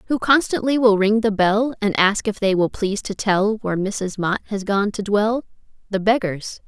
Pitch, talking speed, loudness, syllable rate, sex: 210 Hz, 205 wpm, -20 LUFS, 4.8 syllables/s, female